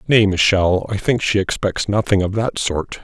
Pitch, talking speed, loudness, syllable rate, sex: 100 Hz, 200 wpm, -18 LUFS, 4.6 syllables/s, male